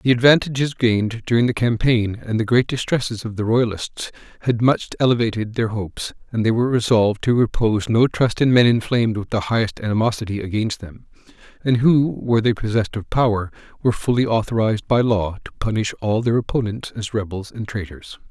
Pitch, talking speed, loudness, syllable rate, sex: 115 Hz, 185 wpm, -20 LUFS, 5.9 syllables/s, male